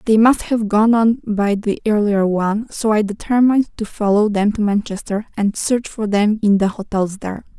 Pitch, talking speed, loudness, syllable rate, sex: 210 Hz, 200 wpm, -17 LUFS, 5.0 syllables/s, female